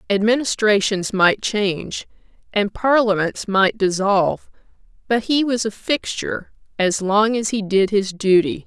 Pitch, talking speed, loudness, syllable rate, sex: 205 Hz, 130 wpm, -19 LUFS, 4.3 syllables/s, female